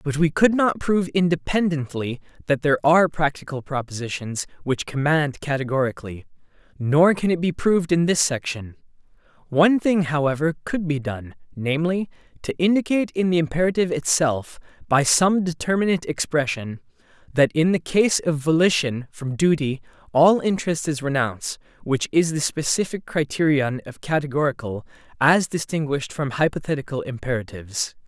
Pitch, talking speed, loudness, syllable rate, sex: 150 Hz, 135 wpm, -22 LUFS, 5.4 syllables/s, male